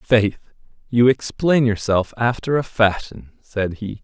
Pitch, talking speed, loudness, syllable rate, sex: 115 Hz, 135 wpm, -19 LUFS, 3.7 syllables/s, male